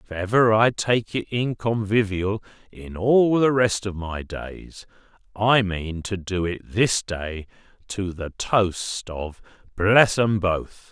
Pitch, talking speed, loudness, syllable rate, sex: 100 Hz, 160 wpm, -22 LUFS, 3.5 syllables/s, male